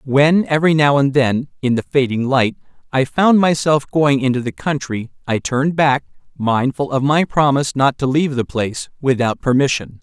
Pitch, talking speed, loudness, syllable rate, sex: 135 Hz, 180 wpm, -17 LUFS, 5.0 syllables/s, male